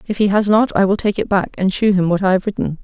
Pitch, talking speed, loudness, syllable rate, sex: 195 Hz, 340 wpm, -16 LUFS, 6.4 syllables/s, female